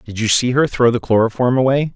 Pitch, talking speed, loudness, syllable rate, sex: 125 Hz, 245 wpm, -16 LUFS, 6.0 syllables/s, male